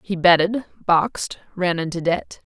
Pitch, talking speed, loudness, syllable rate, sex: 180 Hz, 140 wpm, -20 LUFS, 4.4 syllables/s, female